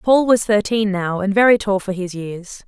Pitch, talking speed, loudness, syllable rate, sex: 205 Hz, 225 wpm, -17 LUFS, 4.7 syllables/s, female